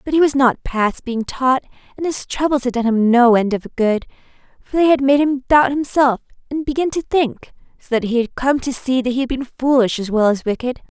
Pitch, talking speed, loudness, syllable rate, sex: 255 Hz, 240 wpm, -17 LUFS, 5.3 syllables/s, female